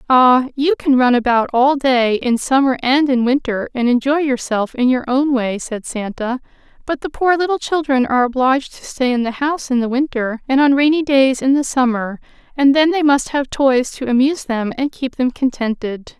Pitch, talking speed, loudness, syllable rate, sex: 260 Hz, 205 wpm, -16 LUFS, 5.1 syllables/s, female